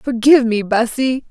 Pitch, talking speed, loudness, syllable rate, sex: 240 Hz, 140 wpm, -15 LUFS, 4.8 syllables/s, female